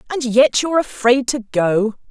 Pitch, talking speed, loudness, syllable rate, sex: 250 Hz, 170 wpm, -17 LUFS, 4.5 syllables/s, female